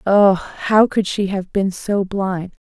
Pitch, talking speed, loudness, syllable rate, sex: 195 Hz, 180 wpm, -18 LUFS, 3.3 syllables/s, female